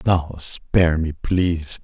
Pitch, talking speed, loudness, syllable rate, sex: 85 Hz, 130 wpm, -21 LUFS, 3.6 syllables/s, male